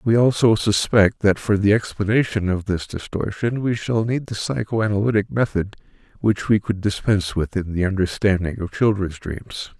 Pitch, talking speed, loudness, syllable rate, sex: 105 Hz, 165 wpm, -21 LUFS, 4.9 syllables/s, male